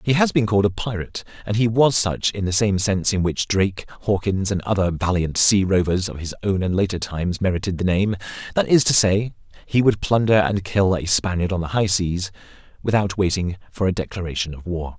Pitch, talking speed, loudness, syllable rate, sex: 95 Hz, 215 wpm, -20 LUFS, 5.7 syllables/s, male